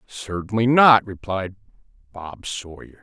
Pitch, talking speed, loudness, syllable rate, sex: 105 Hz, 100 wpm, -20 LUFS, 3.9 syllables/s, male